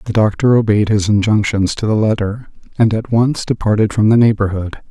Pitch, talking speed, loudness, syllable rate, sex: 110 Hz, 185 wpm, -15 LUFS, 5.4 syllables/s, male